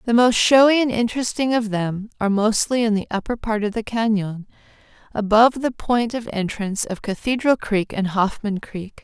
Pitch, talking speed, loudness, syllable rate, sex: 220 Hz, 180 wpm, -20 LUFS, 5.2 syllables/s, female